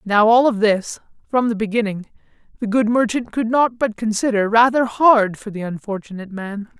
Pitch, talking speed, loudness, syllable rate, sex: 220 Hz, 175 wpm, -18 LUFS, 5.1 syllables/s, male